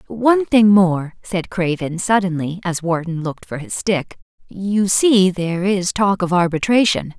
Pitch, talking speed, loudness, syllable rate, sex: 185 Hz, 150 wpm, -17 LUFS, 4.4 syllables/s, female